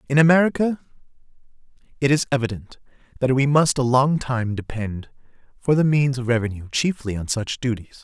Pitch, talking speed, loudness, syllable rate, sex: 130 Hz, 155 wpm, -21 LUFS, 5.4 syllables/s, male